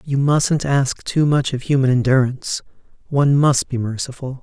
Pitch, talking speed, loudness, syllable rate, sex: 135 Hz, 165 wpm, -18 LUFS, 5.0 syllables/s, male